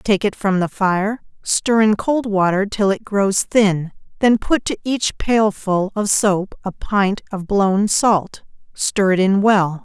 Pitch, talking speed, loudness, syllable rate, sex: 200 Hz, 170 wpm, -18 LUFS, 3.5 syllables/s, female